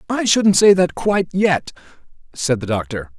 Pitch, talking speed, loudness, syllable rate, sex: 165 Hz, 130 wpm, -17 LUFS, 4.7 syllables/s, male